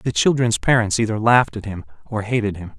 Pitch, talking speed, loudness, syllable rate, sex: 105 Hz, 215 wpm, -19 LUFS, 6.0 syllables/s, male